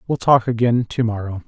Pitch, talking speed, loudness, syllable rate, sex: 115 Hz, 205 wpm, -18 LUFS, 5.4 syllables/s, male